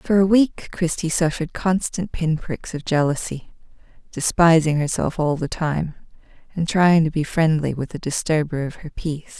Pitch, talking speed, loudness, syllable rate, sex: 160 Hz, 165 wpm, -21 LUFS, 4.9 syllables/s, female